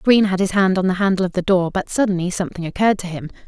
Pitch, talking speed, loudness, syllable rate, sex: 185 Hz, 275 wpm, -19 LUFS, 7.1 syllables/s, female